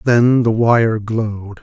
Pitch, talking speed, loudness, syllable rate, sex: 115 Hz, 145 wpm, -15 LUFS, 3.3 syllables/s, male